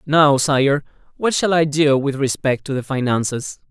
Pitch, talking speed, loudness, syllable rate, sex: 145 Hz, 180 wpm, -18 LUFS, 4.4 syllables/s, male